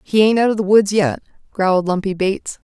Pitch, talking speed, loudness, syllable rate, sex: 200 Hz, 220 wpm, -17 LUFS, 5.9 syllables/s, female